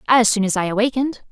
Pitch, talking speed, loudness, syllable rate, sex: 225 Hz, 230 wpm, -18 LUFS, 7.1 syllables/s, female